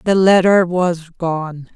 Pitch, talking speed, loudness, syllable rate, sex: 175 Hz, 135 wpm, -15 LUFS, 3.1 syllables/s, female